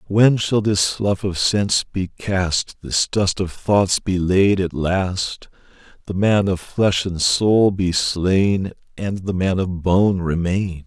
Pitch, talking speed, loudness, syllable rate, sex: 95 Hz, 165 wpm, -19 LUFS, 3.3 syllables/s, male